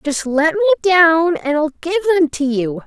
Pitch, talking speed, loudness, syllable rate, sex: 325 Hz, 210 wpm, -15 LUFS, 4.7 syllables/s, female